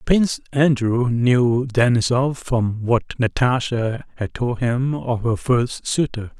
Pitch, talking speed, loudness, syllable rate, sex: 125 Hz, 130 wpm, -20 LUFS, 3.6 syllables/s, male